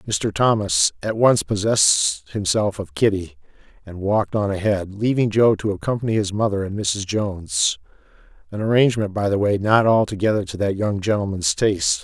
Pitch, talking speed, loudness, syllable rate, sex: 105 Hz, 160 wpm, -20 LUFS, 5.2 syllables/s, male